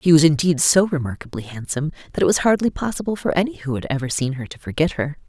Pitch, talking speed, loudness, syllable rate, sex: 155 Hz, 240 wpm, -20 LUFS, 6.7 syllables/s, female